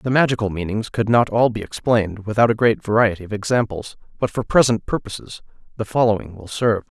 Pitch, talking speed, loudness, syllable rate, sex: 110 Hz, 190 wpm, -19 LUFS, 6.1 syllables/s, male